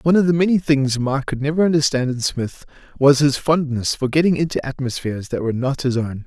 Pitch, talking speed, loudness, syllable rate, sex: 140 Hz, 230 wpm, -19 LUFS, 6.1 syllables/s, male